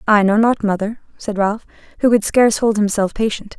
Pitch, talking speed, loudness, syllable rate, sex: 215 Hz, 200 wpm, -17 LUFS, 5.4 syllables/s, female